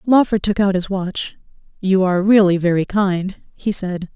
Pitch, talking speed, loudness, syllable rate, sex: 190 Hz, 175 wpm, -18 LUFS, 4.7 syllables/s, female